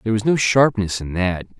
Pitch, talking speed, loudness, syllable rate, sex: 105 Hz, 225 wpm, -19 LUFS, 5.8 syllables/s, male